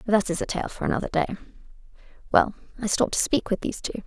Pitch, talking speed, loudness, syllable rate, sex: 205 Hz, 235 wpm, -25 LUFS, 7.8 syllables/s, female